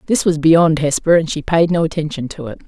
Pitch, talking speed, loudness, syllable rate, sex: 160 Hz, 245 wpm, -15 LUFS, 5.8 syllables/s, female